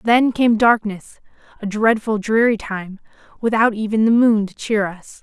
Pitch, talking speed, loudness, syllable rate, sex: 215 Hz, 160 wpm, -18 LUFS, 4.4 syllables/s, female